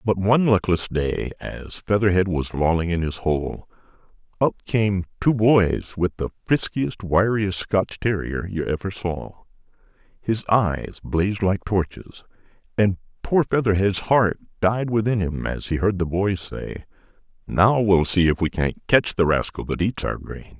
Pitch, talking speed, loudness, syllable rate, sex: 95 Hz, 160 wpm, -22 LUFS, 4.2 syllables/s, male